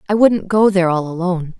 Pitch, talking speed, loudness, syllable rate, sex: 185 Hz, 225 wpm, -16 LUFS, 6.4 syllables/s, female